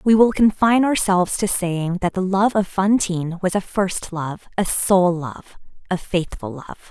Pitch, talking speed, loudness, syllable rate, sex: 185 Hz, 180 wpm, -19 LUFS, 4.6 syllables/s, female